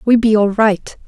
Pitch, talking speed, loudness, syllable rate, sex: 215 Hz, 225 wpm, -14 LUFS, 4.4 syllables/s, female